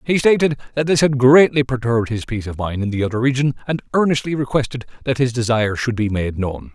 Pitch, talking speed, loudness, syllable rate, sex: 125 Hz, 220 wpm, -18 LUFS, 6.3 syllables/s, male